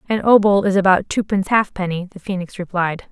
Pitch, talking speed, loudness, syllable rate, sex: 190 Hz, 175 wpm, -18 LUFS, 5.9 syllables/s, female